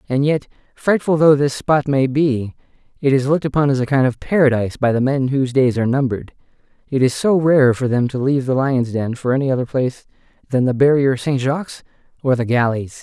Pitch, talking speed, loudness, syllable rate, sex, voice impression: 135 Hz, 215 wpm, -17 LUFS, 6.0 syllables/s, male, masculine, adult-like, tensed, powerful, bright, clear, fluent, intellectual, calm, friendly, reassuring, lively, slightly kind, slightly modest